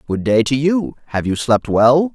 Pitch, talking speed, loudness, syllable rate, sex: 135 Hz, 225 wpm, -16 LUFS, 4.4 syllables/s, male